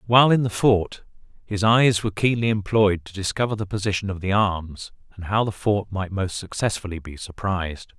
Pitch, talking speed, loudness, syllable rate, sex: 100 Hz, 190 wpm, -22 LUFS, 5.3 syllables/s, male